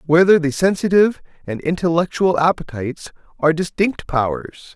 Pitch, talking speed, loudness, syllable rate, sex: 165 Hz, 115 wpm, -18 LUFS, 5.3 syllables/s, male